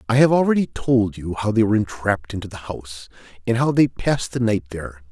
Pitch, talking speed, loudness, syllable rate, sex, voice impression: 110 Hz, 225 wpm, -20 LUFS, 6.3 syllables/s, male, very masculine, very adult-like, old, very thick, tensed, very powerful, bright, soft, muffled, very fluent, slightly raspy, very cool, very intellectual, very sincere, very calm, very mature, friendly, very reassuring, unique, elegant, very wild, sweet, very lively, kind, slightly light